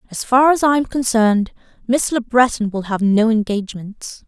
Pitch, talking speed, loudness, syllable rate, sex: 230 Hz, 180 wpm, -16 LUFS, 5.1 syllables/s, female